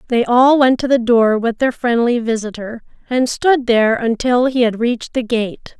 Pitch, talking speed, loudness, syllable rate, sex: 240 Hz, 195 wpm, -15 LUFS, 4.7 syllables/s, female